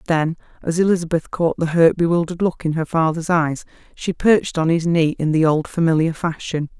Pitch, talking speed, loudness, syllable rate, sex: 165 Hz, 195 wpm, -19 LUFS, 5.6 syllables/s, female